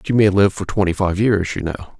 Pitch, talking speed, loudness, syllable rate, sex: 95 Hz, 300 wpm, -18 LUFS, 6.3 syllables/s, male